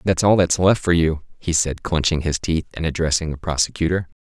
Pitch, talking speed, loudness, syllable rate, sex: 85 Hz, 215 wpm, -20 LUFS, 5.6 syllables/s, male